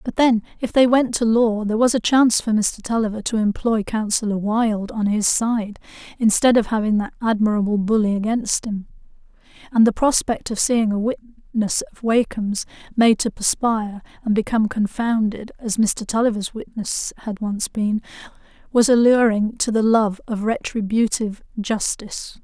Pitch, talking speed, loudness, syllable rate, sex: 220 Hz, 160 wpm, -20 LUFS, 4.9 syllables/s, female